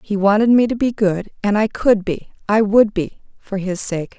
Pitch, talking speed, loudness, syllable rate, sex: 205 Hz, 230 wpm, -17 LUFS, 4.6 syllables/s, female